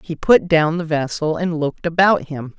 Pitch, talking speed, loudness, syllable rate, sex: 160 Hz, 210 wpm, -17 LUFS, 4.8 syllables/s, female